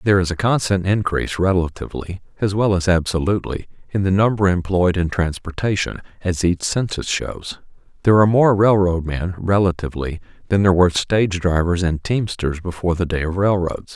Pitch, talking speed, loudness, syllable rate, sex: 90 Hz, 165 wpm, -19 LUFS, 5.7 syllables/s, male